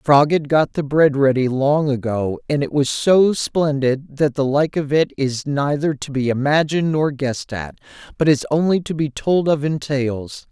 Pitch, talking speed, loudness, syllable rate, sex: 145 Hz, 205 wpm, -18 LUFS, 4.6 syllables/s, male